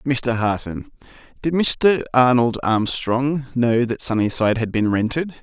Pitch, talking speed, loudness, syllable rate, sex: 125 Hz, 135 wpm, -19 LUFS, 4.2 syllables/s, male